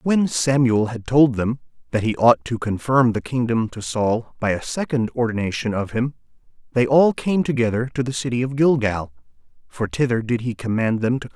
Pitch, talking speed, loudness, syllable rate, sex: 120 Hz, 200 wpm, -20 LUFS, 5.2 syllables/s, male